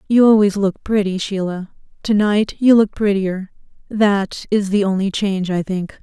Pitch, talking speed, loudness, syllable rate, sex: 200 Hz, 170 wpm, -17 LUFS, 4.6 syllables/s, female